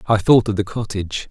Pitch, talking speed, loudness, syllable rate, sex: 105 Hz, 230 wpm, -18 LUFS, 6.3 syllables/s, male